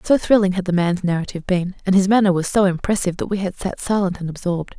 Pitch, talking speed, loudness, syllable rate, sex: 185 Hz, 250 wpm, -19 LUFS, 6.8 syllables/s, female